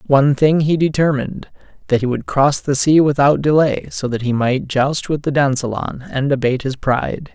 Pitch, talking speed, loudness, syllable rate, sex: 140 Hz, 195 wpm, -17 LUFS, 5.3 syllables/s, male